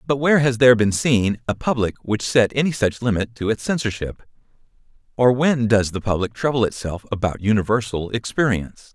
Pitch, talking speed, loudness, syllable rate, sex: 115 Hz, 175 wpm, -20 LUFS, 5.6 syllables/s, male